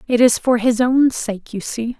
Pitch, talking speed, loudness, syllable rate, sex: 240 Hz, 240 wpm, -17 LUFS, 4.4 syllables/s, female